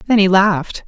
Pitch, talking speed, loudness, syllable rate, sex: 195 Hz, 205 wpm, -14 LUFS, 5.9 syllables/s, female